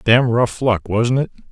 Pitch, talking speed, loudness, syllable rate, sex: 120 Hz, 200 wpm, -17 LUFS, 4.0 syllables/s, male